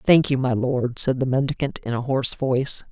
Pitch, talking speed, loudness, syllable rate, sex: 130 Hz, 225 wpm, -22 LUFS, 5.5 syllables/s, female